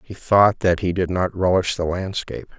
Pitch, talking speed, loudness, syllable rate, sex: 95 Hz, 210 wpm, -20 LUFS, 5.0 syllables/s, male